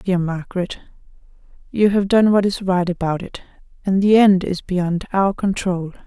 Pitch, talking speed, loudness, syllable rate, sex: 185 Hz, 170 wpm, -18 LUFS, 4.6 syllables/s, female